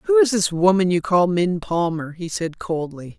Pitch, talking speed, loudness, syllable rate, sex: 170 Hz, 205 wpm, -20 LUFS, 4.4 syllables/s, female